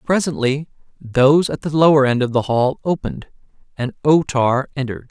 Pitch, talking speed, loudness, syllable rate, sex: 140 Hz, 165 wpm, -17 LUFS, 5.4 syllables/s, male